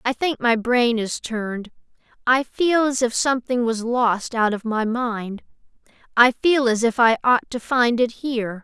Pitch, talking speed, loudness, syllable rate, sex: 240 Hz, 190 wpm, -20 LUFS, 4.3 syllables/s, female